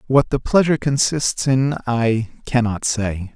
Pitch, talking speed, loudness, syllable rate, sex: 125 Hz, 145 wpm, -19 LUFS, 4.1 syllables/s, male